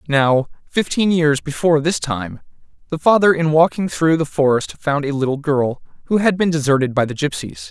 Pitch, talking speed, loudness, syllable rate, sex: 150 Hz, 185 wpm, -17 LUFS, 5.1 syllables/s, male